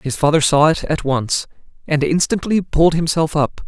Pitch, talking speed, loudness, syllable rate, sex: 155 Hz, 180 wpm, -17 LUFS, 4.9 syllables/s, male